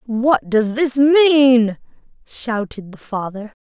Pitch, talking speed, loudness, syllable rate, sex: 240 Hz, 115 wpm, -16 LUFS, 3.0 syllables/s, female